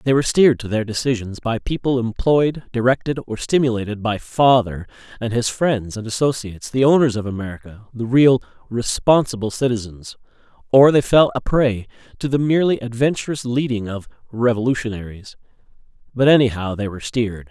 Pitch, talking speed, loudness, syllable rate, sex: 120 Hz, 150 wpm, -19 LUFS, 5.6 syllables/s, male